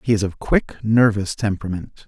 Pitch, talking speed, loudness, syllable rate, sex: 100 Hz, 175 wpm, -20 LUFS, 5.3 syllables/s, male